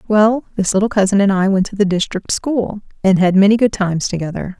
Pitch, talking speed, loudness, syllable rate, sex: 200 Hz, 220 wpm, -16 LUFS, 5.9 syllables/s, female